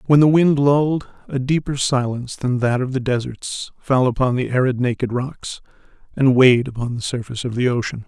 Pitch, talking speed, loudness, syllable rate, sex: 130 Hz, 195 wpm, -19 LUFS, 5.5 syllables/s, male